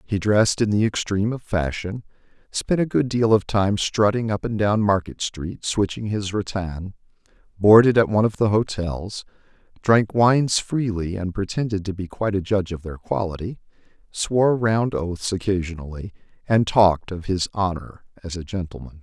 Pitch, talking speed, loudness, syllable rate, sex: 100 Hz, 165 wpm, -21 LUFS, 5.0 syllables/s, male